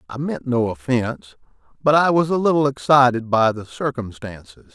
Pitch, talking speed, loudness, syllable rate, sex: 125 Hz, 165 wpm, -19 LUFS, 5.1 syllables/s, male